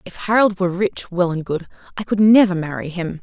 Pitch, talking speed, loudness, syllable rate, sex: 185 Hz, 205 wpm, -18 LUFS, 5.7 syllables/s, female